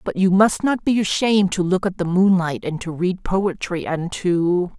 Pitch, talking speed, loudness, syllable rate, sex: 185 Hz, 215 wpm, -19 LUFS, 4.5 syllables/s, female